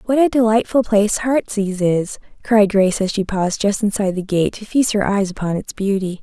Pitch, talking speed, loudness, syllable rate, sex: 205 Hz, 210 wpm, -18 LUFS, 5.6 syllables/s, female